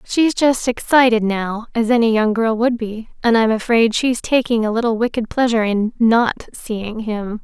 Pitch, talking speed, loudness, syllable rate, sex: 230 Hz, 180 wpm, -17 LUFS, 4.6 syllables/s, female